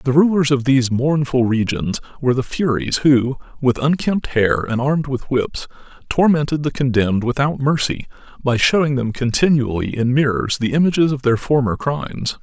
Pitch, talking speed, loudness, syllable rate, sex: 135 Hz, 165 wpm, -18 LUFS, 5.1 syllables/s, male